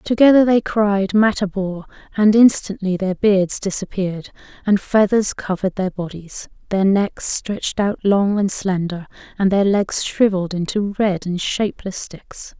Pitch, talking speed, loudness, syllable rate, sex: 195 Hz, 145 wpm, -18 LUFS, 4.4 syllables/s, female